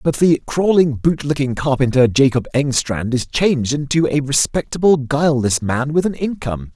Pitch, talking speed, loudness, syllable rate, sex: 140 Hz, 150 wpm, -17 LUFS, 5.1 syllables/s, male